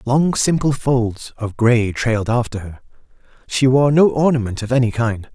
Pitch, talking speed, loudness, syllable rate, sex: 125 Hz, 170 wpm, -17 LUFS, 4.6 syllables/s, male